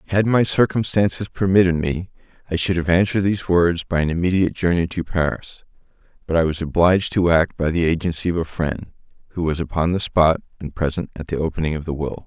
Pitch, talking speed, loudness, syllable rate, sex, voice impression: 85 Hz, 205 wpm, -20 LUFS, 6.1 syllables/s, male, very masculine, very adult-like, middle-aged, very thick, slightly tensed, weak, slightly dark, soft, slightly muffled, fluent, very cool, intellectual, slightly refreshing, very sincere, very calm, very mature, very friendly, reassuring, slightly unique, slightly elegant, slightly wild, kind, slightly modest